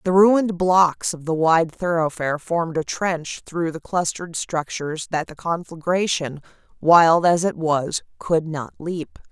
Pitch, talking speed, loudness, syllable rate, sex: 165 Hz, 155 wpm, -21 LUFS, 4.3 syllables/s, female